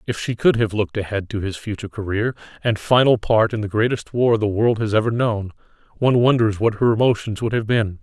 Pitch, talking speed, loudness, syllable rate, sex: 110 Hz, 215 wpm, -20 LUFS, 5.9 syllables/s, male